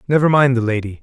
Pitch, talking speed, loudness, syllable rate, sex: 125 Hz, 235 wpm, -15 LUFS, 6.9 syllables/s, male